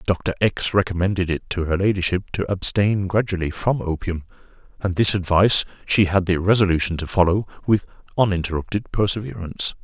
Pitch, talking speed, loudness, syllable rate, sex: 95 Hz, 145 wpm, -21 LUFS, 5.6 syllables/s, male